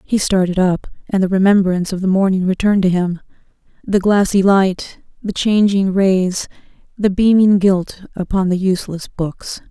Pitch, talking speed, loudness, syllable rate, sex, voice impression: 190 Hz, 150 wpm, -16 LUFS, 4.8 syllables/s, female, feminine, adult-like, tensed, raspy, intellectual, lively, strict, sharp